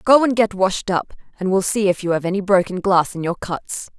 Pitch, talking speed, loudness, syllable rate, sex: 190 Hz, 255 wpm, -19 LUFS, 5.4 syllables/s, female